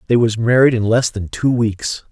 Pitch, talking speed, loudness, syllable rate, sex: 115 Hz, 225 wpm, -16 LUFS, 4.7 syllables/s, male